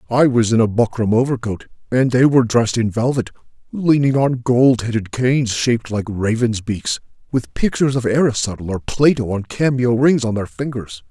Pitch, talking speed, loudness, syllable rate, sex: 120 Hz, 180 wpm, -17 LUFS, 5.2 syllables/s, male